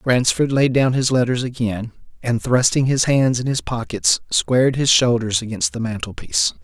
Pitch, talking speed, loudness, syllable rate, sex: 120 Hz, 170 wpm, -18 LUFS, 4.9 syllables/s, male